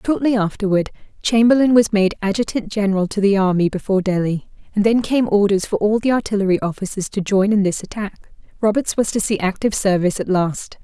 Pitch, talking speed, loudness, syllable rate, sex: 205 Hz, 190 wpm, -18 LUFS, 6.0 syllables/s, female